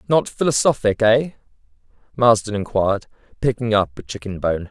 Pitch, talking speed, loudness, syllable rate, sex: 115 Hz, 130 wpm, -19 LUFS, 5.3 syllables/s, male